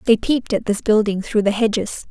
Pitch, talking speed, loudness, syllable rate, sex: 215 Hz, 230 wpm, -19 LUFS, 5.7 syllables/s, female